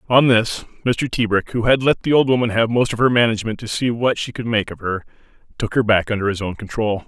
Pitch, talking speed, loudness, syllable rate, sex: 115 Hz, 255 wpm, -19 LUFS, 6.0 syllables/s, male